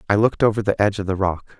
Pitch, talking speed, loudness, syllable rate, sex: 100 Hz, 300 wpm, -20 LUFS, 7.8 syllables/s, male